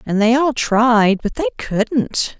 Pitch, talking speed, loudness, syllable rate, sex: 240 Hz, 175 wpm, -16 LUFS, 3.3 syllables/s, female